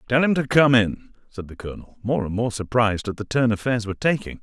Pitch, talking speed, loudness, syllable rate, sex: 115 Hz, 245 wpm, -21 LUFS, 6.3 syllables/s, male